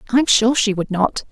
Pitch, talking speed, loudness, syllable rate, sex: 225 Hz, 230 wpm, -17 LUFS, 5.0 syllables/s, female